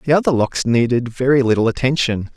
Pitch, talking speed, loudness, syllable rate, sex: 125 Hz, 180 wpm, -17 LUFS, 5.9 syllables/s, male